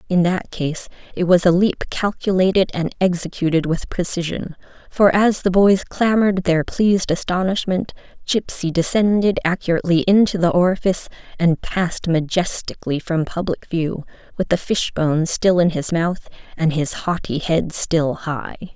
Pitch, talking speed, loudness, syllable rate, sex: 175 Hz, 145 wpm, -19 LUFS, 4.9 syllables/s, female